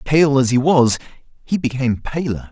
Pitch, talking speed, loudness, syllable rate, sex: 130 Hz, 165 wpm, -17 LUFS, 5.1 syllables/s, male